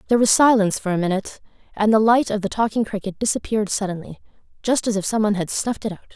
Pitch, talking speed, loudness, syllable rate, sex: 210 Hz, 225 wpm, -20 LUFS, 7.6 syllables/s, female